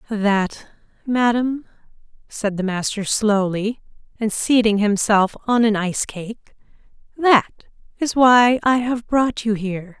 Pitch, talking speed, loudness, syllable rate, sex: 220 Hz, 120 wpm, -19 LUFS, 4.2 syllables/s, female